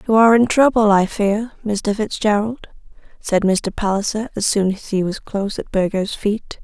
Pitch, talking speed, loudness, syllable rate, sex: 210 Hz, 180 wpm, -18 LUFS, 4.8 syllables/s, female